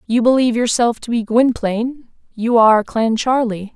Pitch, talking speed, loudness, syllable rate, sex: 235 Hz, 145 wpm, -16 LUFS, 5.0 syllables/s, female